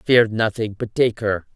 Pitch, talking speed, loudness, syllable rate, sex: 115 Hz, 195 wpm, -20 LUFS, 4.4 syllables/s, female